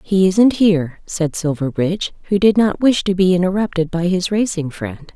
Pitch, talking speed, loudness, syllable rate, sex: 180 Hz, 185 wpm, -17 LUFS, 5.0 syllables/s, female